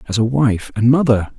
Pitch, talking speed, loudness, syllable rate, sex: 120 Hz, 215 wpm, -16 LUFS, 4.9 syllables/s, male